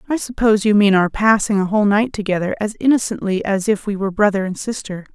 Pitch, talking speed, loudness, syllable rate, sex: 205 Hz, 220 wpm, -17 LUFS, 6.4 syllables/s, female